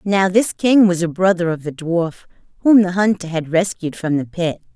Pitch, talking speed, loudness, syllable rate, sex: 180 Hz, 215 wpm, -17 LUFS, 5.0 syllables/s, female